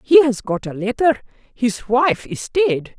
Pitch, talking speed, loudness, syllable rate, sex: 250 Hz, 180 wpm, -19 LUFS, 4.0 syllables/s, female